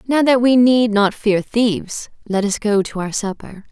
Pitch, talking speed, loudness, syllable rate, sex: 220 Hz, 210 wpm, -17 LUFS, 4.4 syllables/s, female